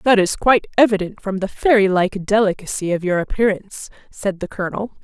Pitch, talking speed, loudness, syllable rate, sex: 200 Hz, 180 wpm, -18 LUFS, 5.8 syllables/s, female